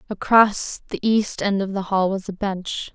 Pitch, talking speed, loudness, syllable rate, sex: 195 Hz, 205 wpm, -21 LUFS, 4.1 syllables/s, female